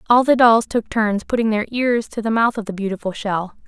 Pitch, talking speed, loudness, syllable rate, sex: 220 Hz, 245 wpm, -18 LUFS, 5.4 syllables/s, female